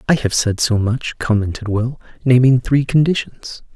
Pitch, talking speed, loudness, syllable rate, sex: 120 Hz, 160 wpm, -17 LUFS, 4.6 syllables/s, male